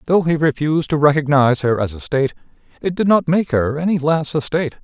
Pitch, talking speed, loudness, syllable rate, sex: 150 Hz, 225 wpm, -17 LUFS, 6.3 syllables/s, male